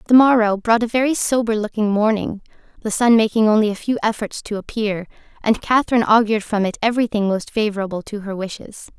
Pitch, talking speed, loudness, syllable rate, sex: 215 Hz, 185 wpm, -18 LUFS, 6.2 syllables/s, female